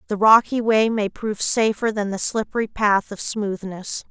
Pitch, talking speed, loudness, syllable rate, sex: 210 Hz, 175 wpm, -20 LUFS, 4.7 syllables/s, female